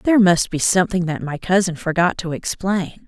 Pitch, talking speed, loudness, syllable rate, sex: 180 Hz, 195 wpm, -19 LUFS, 5.3 syllables/s, female